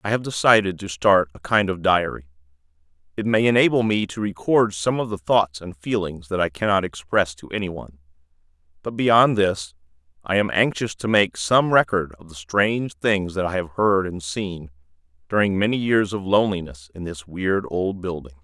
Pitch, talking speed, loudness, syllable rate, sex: 95 Hz, 185 wpm, -21 LUFS, 5.1 syllables/s, male